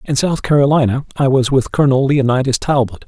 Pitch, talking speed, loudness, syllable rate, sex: 135 Hz, 175 wpm, -15 LUFS, 5.9 syllables/s, male